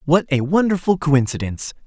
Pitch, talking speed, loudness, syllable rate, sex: 160 Hz, 130 wpm, -18 LUFS, 5.6 syllables/s, male